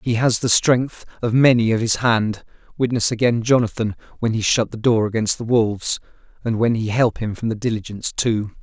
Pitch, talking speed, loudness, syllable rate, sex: 115 Hz, 195 wpm, -19 LUFS, 5.2 syllables/s, male